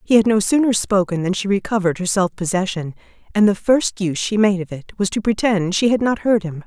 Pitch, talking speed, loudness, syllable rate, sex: 200 Hz, 245 wpm, -18 LUFS, 5.9 syllables/s, female